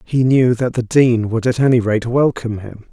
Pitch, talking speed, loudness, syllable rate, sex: 120 Hz, 225 wpm, -16 LUFS, 5.0 syllables/s, male